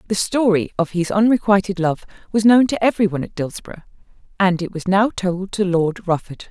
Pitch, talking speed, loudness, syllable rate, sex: 190 Hz, 195 wpm, -18 LUFS, 5.7 syllables/s, female